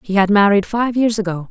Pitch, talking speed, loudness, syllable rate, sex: 205 Hz, 240 wpm, -15 LUFS, 5.7 syllables/s, female